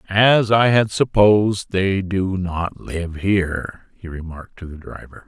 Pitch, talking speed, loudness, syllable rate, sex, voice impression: 95 Hz, 160 wpm, -18 LUFS, 4.0 syllables/s, male, masculine, middle-aged, powerful, slightly hard, clear, slightly fluent, intellectual, calm, slightly mature, reassuring, wild, lively, slightly strict